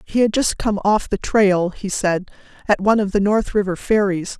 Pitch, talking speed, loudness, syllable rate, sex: 200 Hz, 220 wpm, -18 LUFS, 4.9 syllables/s, female